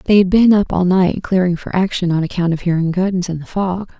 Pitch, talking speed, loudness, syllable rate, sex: 185 Hz, 255 wpm, -16 LUFS, 5.6 syllables/s, female